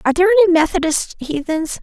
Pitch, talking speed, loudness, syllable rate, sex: 330 Hz, 165 wpm, -16 LUFS, 8.0 syllables/s, female